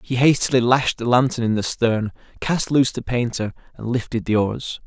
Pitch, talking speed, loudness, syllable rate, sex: 120 Hz, 195 wpm, -20 LUFS, 5.1 syllables/s, male